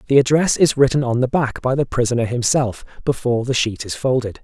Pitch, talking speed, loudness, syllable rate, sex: 125 Hz, 215 wpm, -18 LUFS, 5.9 syllables/s, male